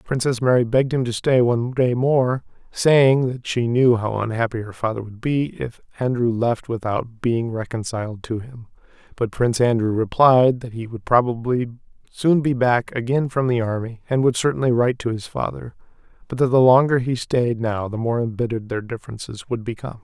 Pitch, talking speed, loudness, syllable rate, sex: 120 Hz, 190 wpm, -20 LUFS, 5.3 syllables/s, male